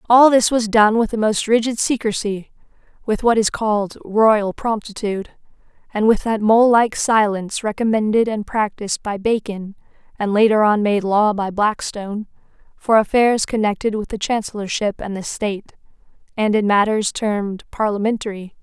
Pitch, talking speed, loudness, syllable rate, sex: 215 Hz, 150 wpm, -18 LUFS, 5.0 syllables/s, female